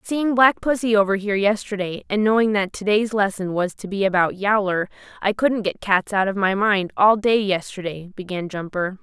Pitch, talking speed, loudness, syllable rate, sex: 200 Hz, 200 wpm, -20 LUFS, 5.1 syllables/s, female